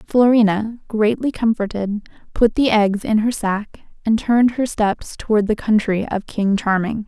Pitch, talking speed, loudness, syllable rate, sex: 215 Hz, 160 wpm, -18 LUFS, 4.5 syllables/s, female